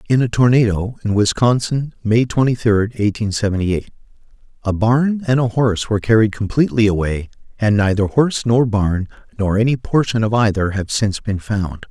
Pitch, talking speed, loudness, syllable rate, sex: 110 Hz, 170 wpm, -17 LUFS, 5.4 syllables/s, male